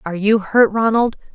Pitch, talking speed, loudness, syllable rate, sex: 215 Hz, 180 wpm, -16 LUFS, 5.5 syllables/s, female